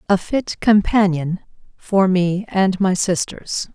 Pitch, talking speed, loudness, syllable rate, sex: 190 Hz, 110 wpm, -18 LUFS, 3.6 syllables/s, female